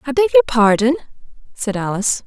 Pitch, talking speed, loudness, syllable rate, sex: 255 Hz, 160 wpm, -16 LUFS, 7.1 syllables/s, female